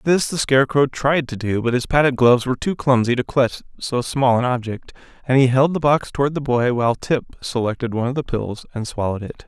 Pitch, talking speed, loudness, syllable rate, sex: 130 Hz, 235 wpm, -19 LUFS, 6.0 syllables/s, male